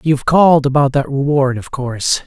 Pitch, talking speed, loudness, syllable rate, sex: 140 Hz, 185 wpm, -14 LUFS, 5.6 syllables/s, male